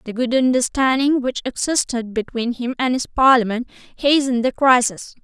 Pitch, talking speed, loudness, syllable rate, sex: 250 Hz, 150 wpm, -18 LUFS, 5.0 syllables/s, female